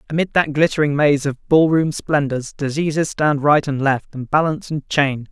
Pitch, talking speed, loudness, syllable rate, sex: 145 Hz, 190 wpm, -18 LUFS, 4.9 syllables/s, male